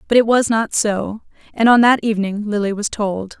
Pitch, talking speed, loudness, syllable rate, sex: 215 Hz, 210 wpm, -17 LUFS, 4.8 syllables/s, female